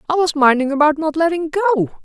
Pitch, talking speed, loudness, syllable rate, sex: 310 Hz, 205 wpm, -16 LUFS, 5.7 syllables/s, female